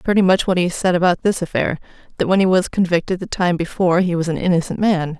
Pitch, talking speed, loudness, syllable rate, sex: 175 Hz, 230 wpm, -18 LUFS, 6.4 syllables/s, female